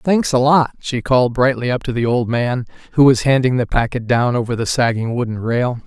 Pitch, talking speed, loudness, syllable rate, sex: 125 Hz, 225 wpm, -17 LUFS, 5.4 syllables/s, male